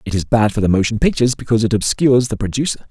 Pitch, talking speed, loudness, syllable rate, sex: 115 Hz, 250 wpm, -16 LUFS, 7.6 syllables/s, male